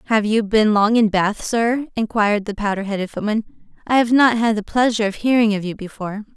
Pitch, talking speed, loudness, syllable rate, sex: 215 Hz, 215 wpm, -18 LUFS, 6.2 syllables/s, female